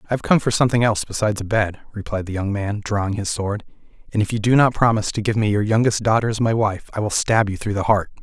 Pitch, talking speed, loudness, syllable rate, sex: 105 Hz, 275 wpm, -20 LUFS, 6.7 syllables/s, male